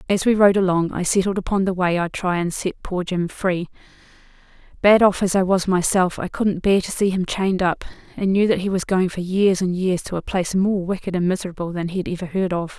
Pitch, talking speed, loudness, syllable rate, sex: 185 Hz, 245 wpm, -20 LUFS, 5.6 syllables/s, female